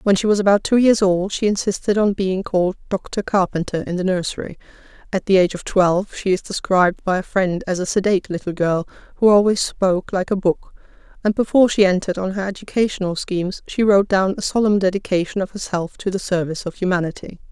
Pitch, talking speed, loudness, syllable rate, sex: 190 Hz, 205 wpm, -19 LUFS, 6.2 syllables/s, female